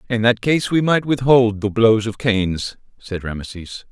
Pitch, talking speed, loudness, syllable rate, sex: 115 Hz, 185 wpm, -18 LUFS, 4.6 syllables/s, male